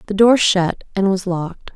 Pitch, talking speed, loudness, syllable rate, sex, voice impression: 195 Hz, 205 wpm, -17 LUFS, 4.8 syllables/s, female, very feminine, adult-like, middle-aged, thin, very tensed, slightly powerful, bright, slightly hard, very clear, intellectual, sincere, calm, slightly unique, very elegant, slightly strict